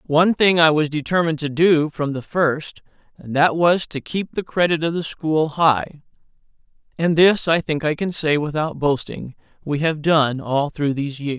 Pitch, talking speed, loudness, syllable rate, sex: 155 Hz, 195 wpm, -19 LUFS, 4.7 syllables/s, male